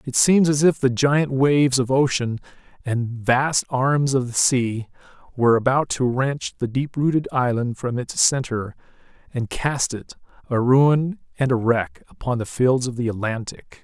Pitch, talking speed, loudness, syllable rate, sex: 130 Hz, 175 wpm, -21 LUFS, 4.4 syllables/s, male